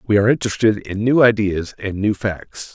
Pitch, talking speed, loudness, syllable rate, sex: 105 Hz, 195 wpm, -18 LUFS, 5.5 syllables/s, male